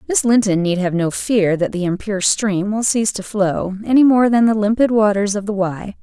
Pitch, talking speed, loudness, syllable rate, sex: 205 Hz, 230 wpm, -17 LUFS, 5.2 syllables/s, female